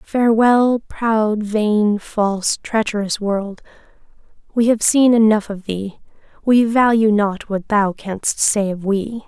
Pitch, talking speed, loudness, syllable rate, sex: 215 Hz, 135 wpm, -17 LUFS, 3.6 syllables/s, female